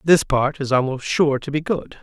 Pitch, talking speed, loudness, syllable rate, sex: 145 Hz, 235 wpm, -20 LUFS, 4.7 syllables/s, male